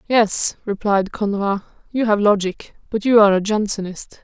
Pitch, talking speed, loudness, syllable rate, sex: 205 Hz, 155 wpm, -19 LUFS, 4.8 syllables/s, female